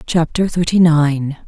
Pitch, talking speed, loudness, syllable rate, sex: 160 Hz, 120 wpm, -15 LUFS, 3.9 syllables/s, female